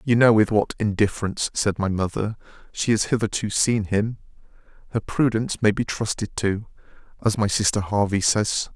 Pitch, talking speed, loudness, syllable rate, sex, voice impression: 105 Hz, 160 wpm, -22 LUFS, 5.3 syllables/s, male, very masculine, very adult-like, very middle-aged, very thick, tensed, very powerful, slightly bright, hard, very clear, fluent, very cool, very intellectual, slightly refreshing, sincere, very calm, very mature, very friendly, very reassuring, slightly unique, wild, slightly sweet, lively, very kind, slightly modest